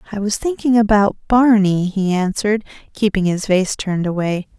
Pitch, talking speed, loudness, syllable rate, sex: 200 Hz, 155 wpm, -17 LUFS, 5.2 syllables/s, female